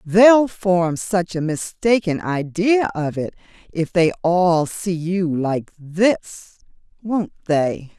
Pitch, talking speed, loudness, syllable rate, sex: 175 Hz, 130 wpm, -19 LUFS, 3.2 syllables/s, female